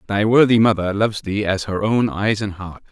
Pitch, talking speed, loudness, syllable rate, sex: 105 Hz, 225 wpm, -18 LUFS, 5.2 syllables/s, male